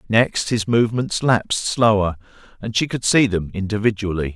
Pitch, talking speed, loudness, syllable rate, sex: 110 Hz, 150 wpm, -19 LUFS, 5.1 syllables/s, male